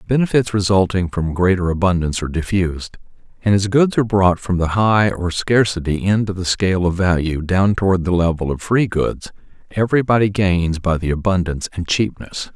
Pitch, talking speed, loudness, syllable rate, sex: 95 Hz, 180 wpm, -18 LUFS, 5.6 syllables/s, male